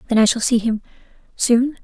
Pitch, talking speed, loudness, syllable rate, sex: 235 Hz, 195 wpm, -18 LUFS, 5.6 syllables/s, female